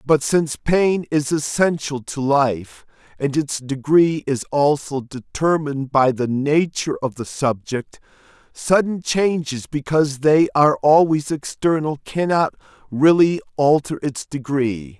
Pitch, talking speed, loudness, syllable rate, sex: 145 Hz, 125 wpm, -19 LUFS, 4.1 syllables/s, male